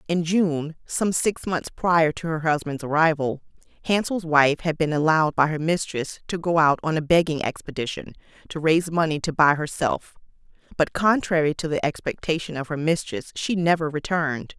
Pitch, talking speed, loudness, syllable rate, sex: 160 Hz, 175 wpm, -23 LUFS, 5.2 syllables/s, female